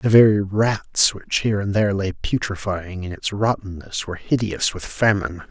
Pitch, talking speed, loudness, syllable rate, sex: 100 Hz, 175 wpm, -21 LUFS, 5.0 syllables/s, male